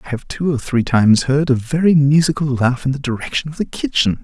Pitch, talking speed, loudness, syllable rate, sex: 140 Hz, 240 wpm, -17 LUFS, 5.8 syllables/s, male